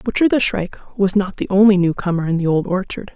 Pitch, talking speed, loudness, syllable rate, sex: 195 Hz, 230 wpm, -17 LUFS, 5.8 syllables/s, female